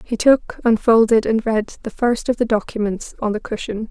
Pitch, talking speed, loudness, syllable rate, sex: 225 Hz, 200 wpm, -18 LUFS, 5.0 syllables/s, female